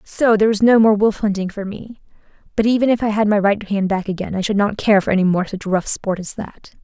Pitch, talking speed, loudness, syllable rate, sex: 205 Hz, 270 wpm, -17 LUFS, 5.9 syllables/s, female